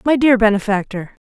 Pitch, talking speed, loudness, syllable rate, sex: 225 Hz, 140 wpm, -15 LUFS, 5.6 syllables/s, female